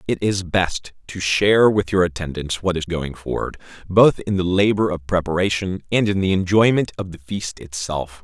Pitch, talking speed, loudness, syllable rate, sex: 95 Hz, 190 wpm, -20 LUFS, 4.9 syllables/s, male